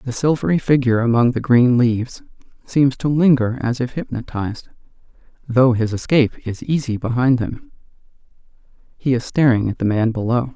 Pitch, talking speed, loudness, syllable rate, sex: 125 Hz, 155 wpm, -18 LUFS, 5.3 syllables/s, male